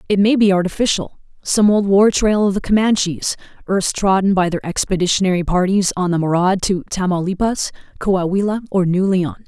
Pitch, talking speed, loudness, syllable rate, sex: 190 Hz, 165 wpm, -17 LUFS, 5.3 syllables/s, female